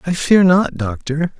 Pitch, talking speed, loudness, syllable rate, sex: 165 Hz, 175 wpm, -15 LUFS, 4.0 syllables/s, male